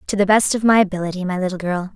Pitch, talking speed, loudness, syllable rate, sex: 190 Hz, 275 wpm, -18 LUFS, 7.2 syllables/s, female